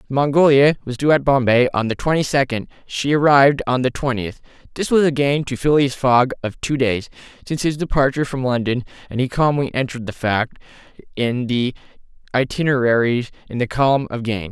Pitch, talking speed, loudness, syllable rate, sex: 130 Hz, 180 wpm, -18 LUFS, 5.7 syllables/s, male